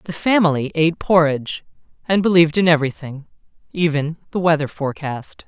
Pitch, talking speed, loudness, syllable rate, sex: 155 Hz, 130 wpm, -18 LUFS, 6.0 syllables/s, male